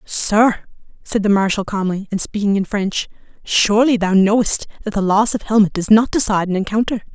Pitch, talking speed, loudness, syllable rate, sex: 205 Hz, 185 wpm, -17 LUFS, 5.4 syllables/s, female